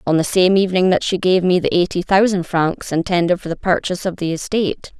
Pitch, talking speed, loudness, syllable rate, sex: 180 Hz, 230 wpm, -17 LUFS, 6.0 syllables/s, female